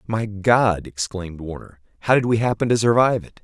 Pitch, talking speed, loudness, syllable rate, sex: 105 Hz, 190 wpm, -20 LUFS, 5.6 syllables/s, male